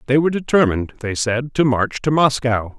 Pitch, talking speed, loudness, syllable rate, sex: 130 Hz, 195 wpm, -18 LUFS, 5.6 syllables/s, male